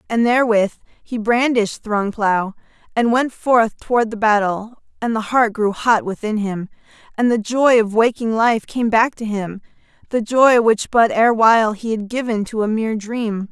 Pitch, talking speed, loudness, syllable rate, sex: 225 Hz, 180 wpm, -17 LUFS, 4.8 syllables/s, female